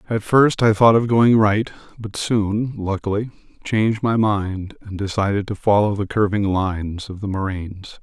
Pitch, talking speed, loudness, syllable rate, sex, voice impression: 105 Hz, 170 wpm, -19 LUFS, 4.6 syllables/s, male, masculine, very adult-like, slightly thick, cool, calm, slightly elegant